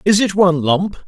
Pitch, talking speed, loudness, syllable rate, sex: 180 Hz, 225 wpm, -15 LUFS, 5.2 syllables/s, male